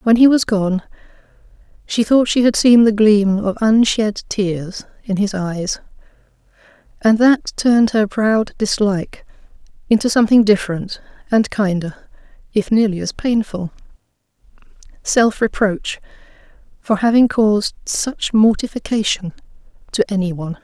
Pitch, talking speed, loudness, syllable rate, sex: 210 Hz, 120 wpm, -16 LUFS, 4.7 syllables/s, female